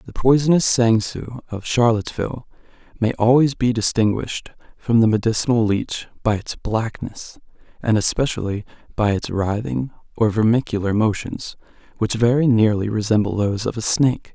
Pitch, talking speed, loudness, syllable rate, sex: 115 Hz, 135 wpm, -20 LUFS, 5.1 syllables/s, male